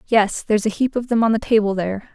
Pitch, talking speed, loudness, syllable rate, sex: 215 Hz, 280 wpm, -19 LUFS, 6.6 syllables/s, female